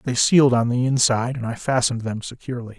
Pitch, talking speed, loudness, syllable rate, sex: 120 Hz, 215 wpm, -20 LUFS, 6.7 syllables/s, male